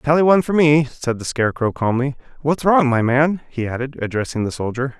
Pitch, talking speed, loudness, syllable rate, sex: 135 Hz, 205 wpm, -18 LUFS, 5.7 syllables/s, male